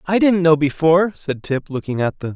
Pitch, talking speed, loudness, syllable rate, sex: 160 Hz, 230 wpm, -18 LUFS, 5.3 syllables/s, male